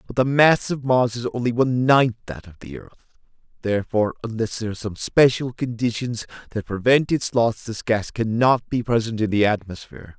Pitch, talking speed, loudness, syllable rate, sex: 115 Hz, 190 wpm, -21 LUFS, 5.6 syllables/s, male